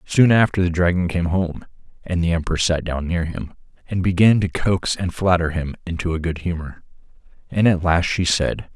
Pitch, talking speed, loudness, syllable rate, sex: 85 Hz, 200 wpm, -20 LUFS, 5.0 syllables/s, male